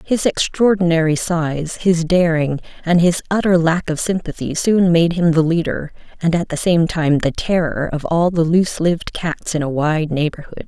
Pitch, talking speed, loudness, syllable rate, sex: 165 Hz, 175 wpm, -17 LUFS, 4.8 syllables/s, female